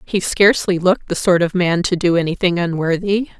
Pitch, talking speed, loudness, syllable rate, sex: 180 Hz, 195 wpm, -16 LUFS, 5.6 syllables/s, female